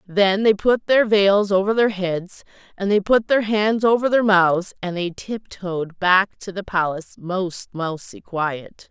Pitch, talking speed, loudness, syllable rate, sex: 195 Hz, 175 wpm, -20 LUFS, 3.8 syllables/s, female